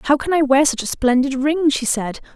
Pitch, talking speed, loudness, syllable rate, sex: 275 Hz, 255 wpm, -17 LUFS, 5.1 syllables/s, female